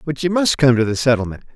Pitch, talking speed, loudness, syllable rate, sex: 135 Hz, 270 wpm, -17 LUFS, 6.7 syllables/s, male